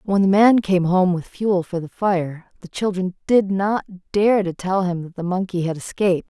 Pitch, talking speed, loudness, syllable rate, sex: 190 Hz, 215 wpm, -20 LUFS, 4.7 syllables/s, female